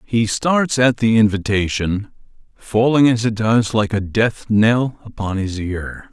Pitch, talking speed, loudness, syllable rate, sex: 110 Hz, 145 wpm, -17 LUFS, 3.8 syllables/s, male